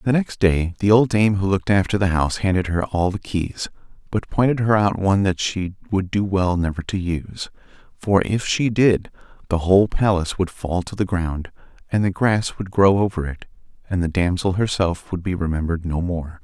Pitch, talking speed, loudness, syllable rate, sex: 95 Hz, 210 wpm, -20 LUFS, 5.3 syllables/s, male